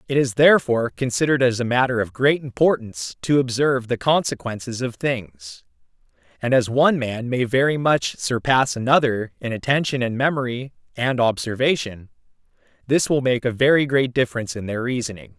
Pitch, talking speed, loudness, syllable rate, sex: 120 Hz, 160 wpm, -20 LUFS, 5.5 syllables/s, male